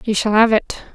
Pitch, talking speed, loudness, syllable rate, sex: 220 Hz, 255 wpm, -16 LUFS, 5.3 syllables/s, female